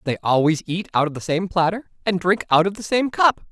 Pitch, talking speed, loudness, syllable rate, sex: 180 Hz, 255 wpm, -20 LUFS, 5.7 syllables/s, male